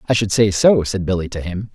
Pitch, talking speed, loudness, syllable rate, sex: 100 Hz, 275 wpm, -17 LUFS, 5.8 syllables/s, male